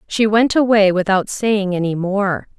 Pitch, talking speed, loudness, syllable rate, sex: 200 Hz, 165 wpm, -16 LUFS, 4.2 syllables/s, female